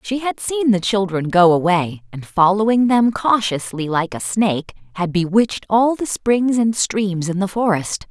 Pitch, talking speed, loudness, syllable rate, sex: 200 Hz, 180 wpm, -18 LUFS, 4.4 syllables/s, female